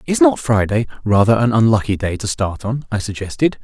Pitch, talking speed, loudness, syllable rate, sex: 110 Hz, 200 wpm, -17 LUFS, 5.4 syllables/s, male